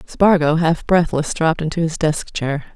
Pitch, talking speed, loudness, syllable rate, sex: 160 Hz, 175 wpm, -18 LUFS, 4.7 syllables/s, female